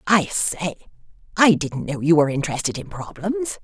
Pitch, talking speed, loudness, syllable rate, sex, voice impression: 175 Hz, 165 wpm, -21 LUFS, 5.3 syllables/s, female, feminine, adult-like, slightly friendly, slightly elegant